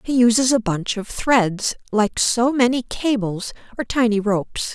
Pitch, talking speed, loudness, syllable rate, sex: 230 Hz, 165 wpm, -19 LUFS, 4.3 syllables/s, female